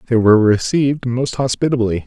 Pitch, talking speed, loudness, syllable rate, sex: 120 Hz, 145 wpm, -16 LUFS, 5.9 syllables/s, male